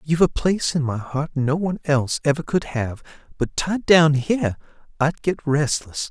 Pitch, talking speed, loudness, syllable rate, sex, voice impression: 150 Hz, 185 wpm, -21 LUFS, 5.0 syllables/s, male, very masculine, middle-aged, thick, sincere, calm